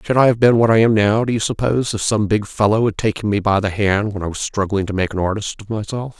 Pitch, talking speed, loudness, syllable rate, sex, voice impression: 105 Hz, 300 wpm, -18 LUFS, 6.3 syllables/s, male, very masculine, very middle-aged, very thick, tensed, powerful, slightly bright, very soft, very muffled, slightly halting, raspy, very cool, very intellectual, slightly refreshing, sincere, very calm, very mature, friendly, reassuring, unique, very elegant, very wild, sweet, lively, very kind, slightly intense